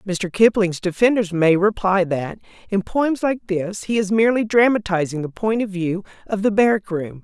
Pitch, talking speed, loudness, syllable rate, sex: 200 Hz, 185 wpm, -19 LUFS, 4.9 syllables/s, female